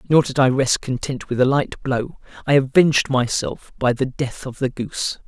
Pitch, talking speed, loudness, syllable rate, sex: 135 Hz, 205 wpm, -20 LUFS, 4.9 syllables/s, male